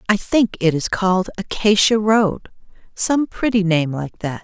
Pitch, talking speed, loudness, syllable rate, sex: 195 Hz, 160 wpm, -18 LUFS, 4.3 syllables/s, female